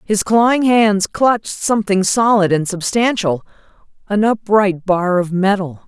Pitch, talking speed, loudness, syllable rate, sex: 200 Hz, 135 wpm, -15 LUFS, 4.3 syllables/s, female